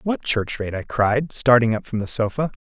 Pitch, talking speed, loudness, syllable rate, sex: 120 Hz, 230 wpm, -21 LUFS, 4.9 syllables/s, male